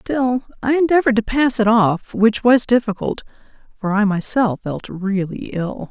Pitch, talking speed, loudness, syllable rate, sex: 225 Hz, 165 wpm, -18 LUFS, 4.5 syllables/s, female